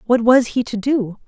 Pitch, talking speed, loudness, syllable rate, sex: 235 Hz, 235 wpm, -17 LUFS, 4.7 syllables/s, female